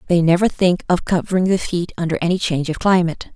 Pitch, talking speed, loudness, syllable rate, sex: 175 Hz, 215 wpm, -18 LUFS, 6.5 syllables/s, female